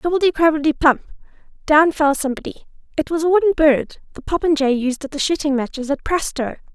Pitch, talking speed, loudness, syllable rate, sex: 300 Hz, 170 wpm, -18 LUFS, 6.3 syllables/s, female